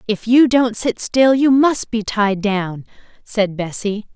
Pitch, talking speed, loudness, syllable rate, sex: 225 Hz, 175 wpm, -16 LUFS, 3.7 syllables/s, female